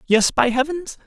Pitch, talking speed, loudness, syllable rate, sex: 275 Hz, 170 wpm, -19 LUFS, 4.7 syllables/s, female